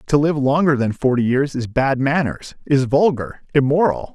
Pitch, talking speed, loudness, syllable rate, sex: 140 Hz, 175 wpm, -18 LUFS, 4.7 syllables/s, male